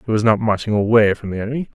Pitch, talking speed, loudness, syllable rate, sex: 110 Hz, 270 wpm, -18 LUFS, 7.5 syllables/s, male